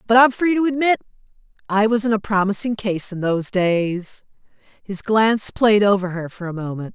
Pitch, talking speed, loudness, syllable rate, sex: 205 Hz, 180 wpm, -19 LUFS, 5.0 syllables/s, female